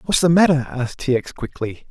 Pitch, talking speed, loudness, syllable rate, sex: 140 Hz, 220 wpm, -19 LUFS, 5.9 syllables/s, male